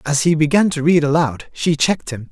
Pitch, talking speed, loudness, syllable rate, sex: 155 Hz, 235 wpm, -17 LUFS, 5.5 syllables/s, male